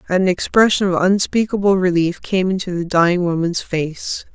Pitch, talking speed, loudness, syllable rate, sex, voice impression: 180 Hz, 150 wpm, -17 LUFS, 4.9 syllables/s, female, feminine, adult-like, tensed, powerful, slightly bright, clear, intellectual, friendly, elegant, lively, slightly sharp